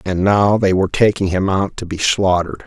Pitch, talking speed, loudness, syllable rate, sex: 95 Hz, 225 wpm, -16 LUFS, 5.5 syllables/s, male